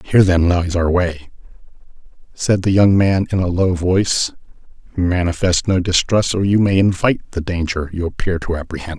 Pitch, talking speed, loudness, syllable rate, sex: 90 Hz, 175 wpm, -17 LUFS, 5.2 syllables/s, male